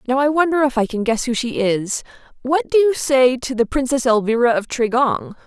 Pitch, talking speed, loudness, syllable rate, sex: 250 Hz, 220 wpm, -18 LUFS, 5.2 syllables/s, female